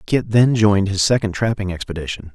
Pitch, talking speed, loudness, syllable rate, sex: 100 Hz, 180 wpm, -18 LUFS, 5.8 syllables/s, male